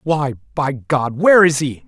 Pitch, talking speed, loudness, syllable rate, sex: 140 Hz, 195 wpm, -16 LUFS, 4.5 syllables/s, male